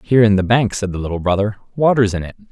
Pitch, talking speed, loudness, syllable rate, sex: 105 Hz, 260 wpm, -17 LUFS, 7.2 syllables/s, male